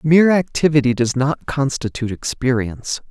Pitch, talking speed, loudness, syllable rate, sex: 135 Hz, 115 wpm, -18 LUFS, 5.4 syllables/s, male